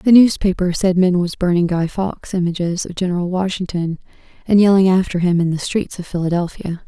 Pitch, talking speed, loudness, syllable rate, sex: 180 Hz, 185 wpm, -17 LUFS, 5.7 syllables/s, female